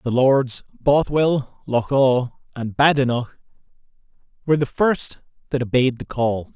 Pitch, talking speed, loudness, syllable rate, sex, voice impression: 130 Hz, 130 wpm, -20 LUFS, 4.0 syllables/s, male, very masculine, slightly middle-aged, thick, very tensed, powerful, bright, hard, clear, fluent, slightly raspy, cool, intellectual, slightly refreshing, sincere, calm, mature, friendly, reassuring, slightly unique, slightly elegant, wild, slightly sweet, lively, kind, slightly modest